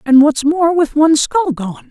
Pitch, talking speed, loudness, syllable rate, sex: 295 Hz, 190 wpm, -13 LUFS, 4.5 syllables/s, female